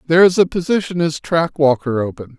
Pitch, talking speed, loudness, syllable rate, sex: 155 Hz, 200 wpm, -16 LUFS, 5.7 syllables/s, male